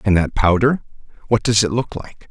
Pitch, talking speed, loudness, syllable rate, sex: 110 Hz, 210 wpm, -18 LUFS, 5.1 syllables/s, male